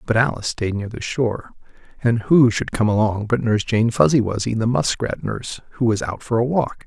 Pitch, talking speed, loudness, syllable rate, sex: 115 Hz, 210 wpm, -20 LUFS, 5.6 syllables/s, male